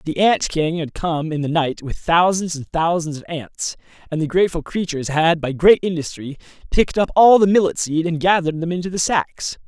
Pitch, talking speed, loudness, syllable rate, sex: 165 Hz, 210 wpm, -19 LUFS, 5.4 syllables/s, male